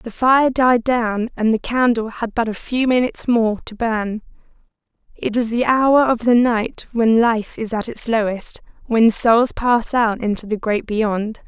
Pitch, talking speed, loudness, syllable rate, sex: 230 Hz, 185 wpm, -18 LUFS, 4.1 syllables/s, female